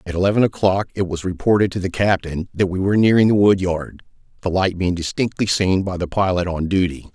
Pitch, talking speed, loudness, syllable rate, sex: 95 Hz, 210 wpm, -19 LUFS, 5.8 syllables/s, male